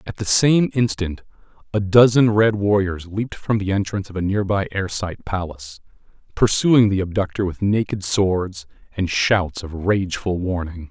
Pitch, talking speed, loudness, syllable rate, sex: 95 Hz, 155 wpm, -20 LUFS, 4.9 syllables/s, male